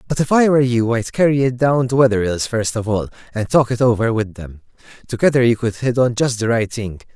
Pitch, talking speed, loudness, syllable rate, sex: 120 Hz, 245 wpm, -17 LUFS, 5.8 syllables/s, male